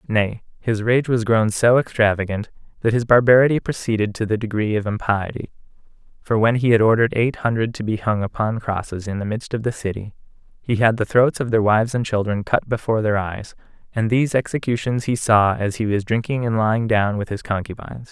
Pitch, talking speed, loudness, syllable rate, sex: 110 Hz, 205 wpm, -20 LUFS, 5.8 syllables/s, male